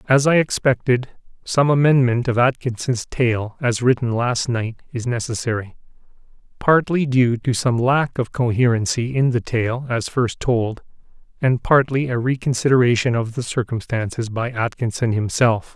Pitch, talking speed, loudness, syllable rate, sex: 120 Hz, 140 wpm, -19 LUFS, 4.6 syllables/s, male